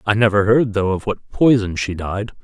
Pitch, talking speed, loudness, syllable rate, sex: 105 Hz, 220 wpm, -18 LUFS, 5.0 syllables/s, male